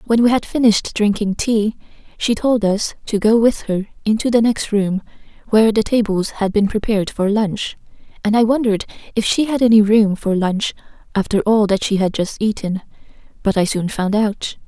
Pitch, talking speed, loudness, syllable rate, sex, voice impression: 210 Hz, 190 wpm, -17 LUFS, 5.2 syllables/s, female, very feminine, slightly adult-like, slightly cute, slightly calm, friendly, slightly kind